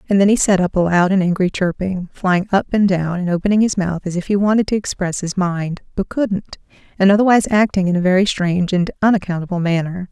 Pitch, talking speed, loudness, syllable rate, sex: 185 Hz, 225 wpm, -17 LUFS, 6.0 syllables/s, female